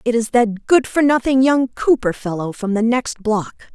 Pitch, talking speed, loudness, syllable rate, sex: 235 Hz, 210 wpm, -17 LUFS, 4.4 syllables/s, female